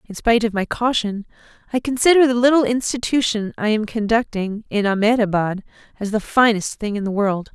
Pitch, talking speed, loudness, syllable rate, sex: 220 Hz, 175 wpm, -19 LUFS, 5.5 syllables/s, female